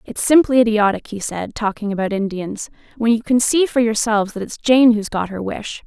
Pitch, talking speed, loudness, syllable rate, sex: 225 Hz, 215 wpm, -18 LUFS, 5.3 syllables/s, female